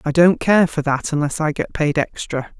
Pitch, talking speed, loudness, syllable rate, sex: 155 Hz, 230 wpm, -18 LUFS, 4.9 syllables/s, female